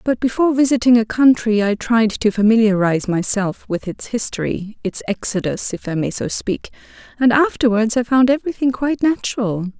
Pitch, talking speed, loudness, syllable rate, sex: 230 Hz, 165 wpm, -18 LUFS, 5.4 syllables/s, female